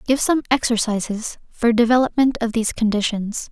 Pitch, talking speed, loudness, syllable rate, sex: 230 Hz, 135 wpm, -19 LUFS, 5.4 syllables/s, female